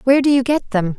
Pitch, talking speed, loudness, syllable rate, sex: 250 Hz, 305 wpm, -16 LUFS, 6.7 syllables/s, female